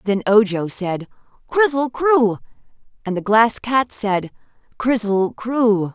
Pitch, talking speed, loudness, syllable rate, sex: 220 Hz, 120 wpm, -18 LUFS, 3.6 syllables/s, female